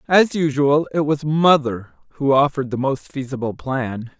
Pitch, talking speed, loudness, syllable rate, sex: 140 Hz, 155 wpm, -19 LUFS, 4.7 syllables/s, male